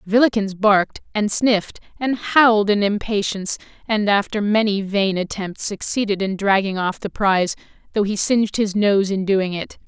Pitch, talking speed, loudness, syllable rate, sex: 205 Hz, 165 wpm, -19 LUFS, 5.0 syllables/s, female